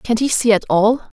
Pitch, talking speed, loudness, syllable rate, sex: 225 Hz, 250 wpm, -16 LUFS, 4.8 syllables/s, female